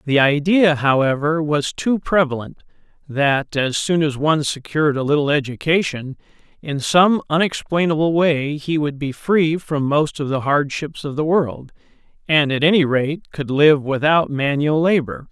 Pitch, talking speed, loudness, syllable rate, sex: 150 Hz, 155 wpm, -18 LUFS, 4.5 syllables/s, male